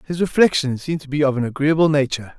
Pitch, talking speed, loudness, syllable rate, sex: 145 Hz, 225 wpm, -19 LUFS, 7.1 syllables/s, male